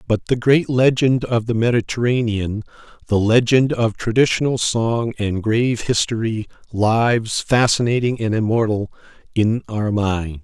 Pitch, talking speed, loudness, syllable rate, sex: 115 Hz, 125 wpm, -18 LUFS, 4.5 syllables/s, male